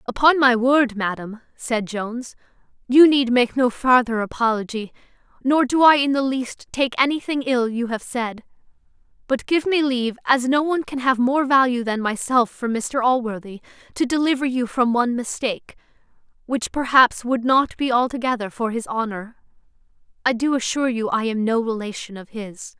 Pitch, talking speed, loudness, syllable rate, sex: 245 Hz, 170 wpm, -20 LUFS, 5.0 syllables/s, female